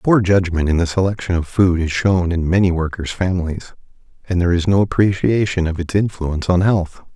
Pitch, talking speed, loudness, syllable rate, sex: 90 Hz, 195 wpm, -17 LUFS, 5.6 syllables/s, male